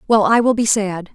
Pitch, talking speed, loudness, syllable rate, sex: 210 Hz, 260 wpm, -16 LUFS, 5.2 syllables/s, female